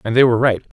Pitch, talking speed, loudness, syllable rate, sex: 115 Hz, 305 wpm, -15 LUFS, 7.9 syllables/s, male